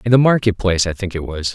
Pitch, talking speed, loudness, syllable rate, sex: 100 Hz, 310 wpm, -17 LUFS, 6.9 syllables/s, male